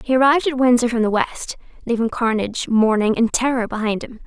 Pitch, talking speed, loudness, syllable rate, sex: 235 Hz, 195 wpm, -18 LUFS, 6.0 syllables/s, female